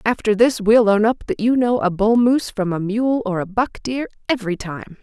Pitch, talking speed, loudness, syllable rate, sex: 220 Hz, 240 wpm, -18 LUFS, 5.1 syllables/s, female